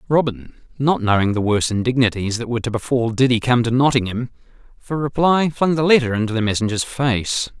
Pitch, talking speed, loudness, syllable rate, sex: 120 Hz, 190 wpm, -19 LUFS, 5.8 syllables/s, male